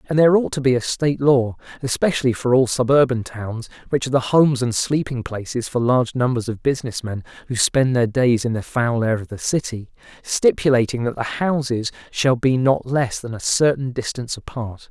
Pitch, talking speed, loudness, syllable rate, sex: 125 Hz, 200 wpm, -20 LUFS, 5.5 syllables/s, male